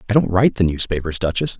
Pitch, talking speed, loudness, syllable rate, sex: 100 Hz, 225 wpm, -18 LUFS, 7.1 syllables/s, male